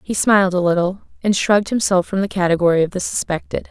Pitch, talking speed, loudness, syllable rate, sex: 185 Hz, 210 wpm, -18 LUFS, 6.5 syllables/s, female